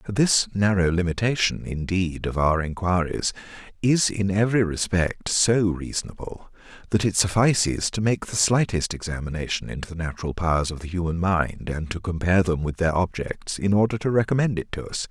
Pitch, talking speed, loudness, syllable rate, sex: 95 Hz, 170 wpm, -23 LUFS, 5.3 syllables/s, male